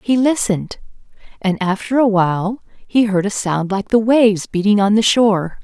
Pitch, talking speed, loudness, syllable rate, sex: 210 Hz, 180 wpm, -16 LUFS, 5.0 syllables/s, female